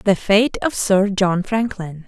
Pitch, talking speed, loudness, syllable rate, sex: 195 Hz, 175 wpm, -18 LUFS, 3.5 syllables/s, female